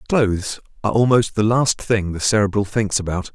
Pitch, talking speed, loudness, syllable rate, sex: 105 Hz, 180 wpm, -19 LUFS, 5.5 syllables/s, male